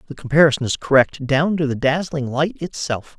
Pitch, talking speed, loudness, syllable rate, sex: 145 Hz, 190 wpm, -19 LUFS, 5.3 syllables/s, male